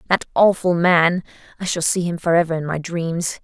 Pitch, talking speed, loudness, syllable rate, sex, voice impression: 170 Hz, 190 wpm, -19 LUFS, 5.1 syllables/s, female, feminine, adult-like, tensed, powerful, hard, fluent, intellectual, calm, elegant, lively, strict, sharp